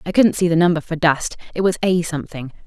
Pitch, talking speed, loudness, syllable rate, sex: 170 Hz, 245 wpm, -18 LUFS, 6.3 syllables/s, female